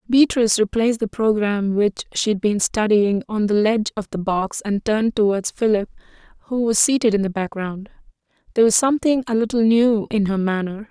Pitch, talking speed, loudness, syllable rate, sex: 215 Hz, 185 wpm, -19 LUFS, 5.7 syllables/s, female